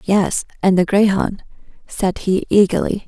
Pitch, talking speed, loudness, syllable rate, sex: 195 Hz, 135 wpm, -17 LUFS, 4.3 syllables/s, female